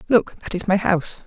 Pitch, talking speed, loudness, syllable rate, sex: 195 Hz, 235 wpm, -21 LUFS, 5.5 syllables/s, female